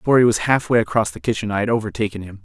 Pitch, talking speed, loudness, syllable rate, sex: 110 Hz, 270 wpm, -19 LUFS, 8.2 syllables/s, male